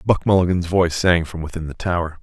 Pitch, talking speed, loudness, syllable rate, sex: 85 Hz, 215 wpm, -19 LUFS, 6.3 syllables/s, male